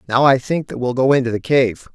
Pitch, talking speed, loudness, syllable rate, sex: 130 Hz, 280 wpm, -17 LUFS, 5.7 syllables/s, male